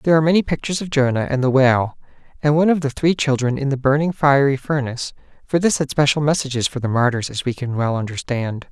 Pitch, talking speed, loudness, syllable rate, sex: 140 Hz, 225 wpm, -19 LUFS, 6.6 syllables/s, male